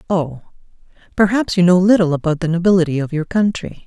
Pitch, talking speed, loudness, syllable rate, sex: 175 Hz, 170 wpm, -16 LUFS, 5.9 syllables/s, female